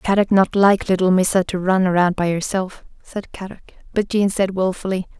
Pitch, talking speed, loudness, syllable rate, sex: 190 Hz, 185 wpm, -18 LUFS, 5.1 syllables/s, female